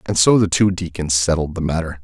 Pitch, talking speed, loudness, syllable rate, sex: 85 Hz, 235 wpm, -17 LUFS, 5.7 syllables/s, male